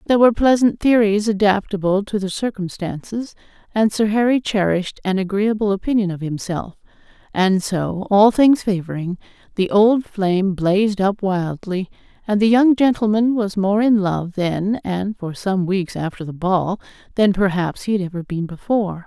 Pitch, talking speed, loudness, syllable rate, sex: 200 Hz, 160 wpm, -19 LUFS, 4.8 syllables/s, female